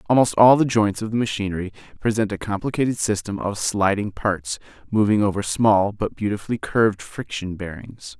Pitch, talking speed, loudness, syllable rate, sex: 105 Hz, 160 wpm, -21 LUFS, 5.4 syllables/s, male